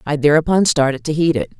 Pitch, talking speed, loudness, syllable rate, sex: 150 Hz, 225 wpm, -16 LUFS, 6.2 syllables/s, female